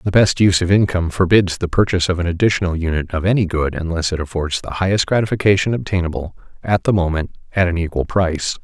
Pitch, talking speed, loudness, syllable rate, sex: 90 Hz, 200 wpm, -18 LUFS, 6.6 syllables/s, male